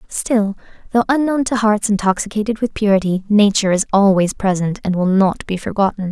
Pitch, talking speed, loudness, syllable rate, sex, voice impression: 205 Hz, 165 wpm, -16 LUFS, 5.5 syllables/s, female, feminine, slightly adult-like, slightly soft, slightly cute, slightly refreshing, friendly, slightly sweet, kind